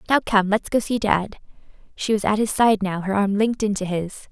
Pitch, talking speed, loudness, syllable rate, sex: 205 Hz, 235 wpm, -21 LUFS, 5.5 syllables/s, female